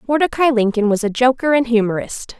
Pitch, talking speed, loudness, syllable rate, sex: 240 Hz, 175 wpm, -16 LUFS, 5.8 syllables/s, female